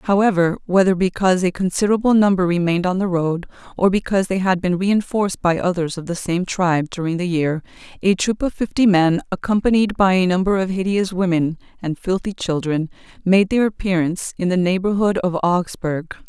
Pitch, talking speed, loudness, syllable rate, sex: 185 Hz, 175 wpm, -19 LUFS, 5.6 syllables/s, female